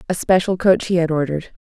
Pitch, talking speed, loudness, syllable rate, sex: 170 Hz, 220 wpm, -18 LUFS, 6.4 syllables/s, female